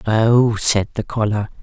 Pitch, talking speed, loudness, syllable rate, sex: 110 Hz, 150 wpm, -17 LUFS, 3.8 syllables/s, female